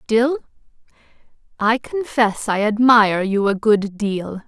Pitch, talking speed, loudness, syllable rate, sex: 220 Hz, 120 wpm, -18 LUFS, 3.8 syllables/s, female